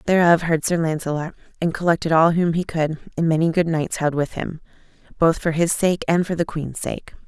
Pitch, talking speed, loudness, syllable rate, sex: 165 Hz, 215 wpm, -21 LUFS, 5.3 syllables/s, female